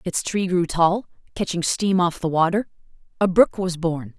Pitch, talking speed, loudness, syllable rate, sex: 180 Hz, 185 wpm, -21 LUFS, 4.5 syllables/s, female